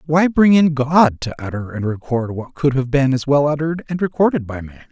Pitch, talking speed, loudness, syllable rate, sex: 140 Hz, 230 wpm, -17 LUFS, 5.5 syllables/s, male